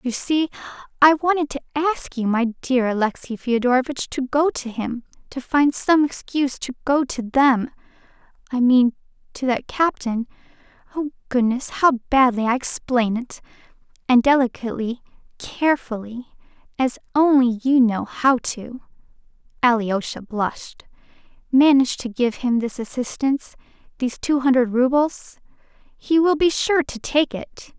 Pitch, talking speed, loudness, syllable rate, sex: 260 Hz, 130 wpm, -20 LUFS, 4.5 syllables/s, female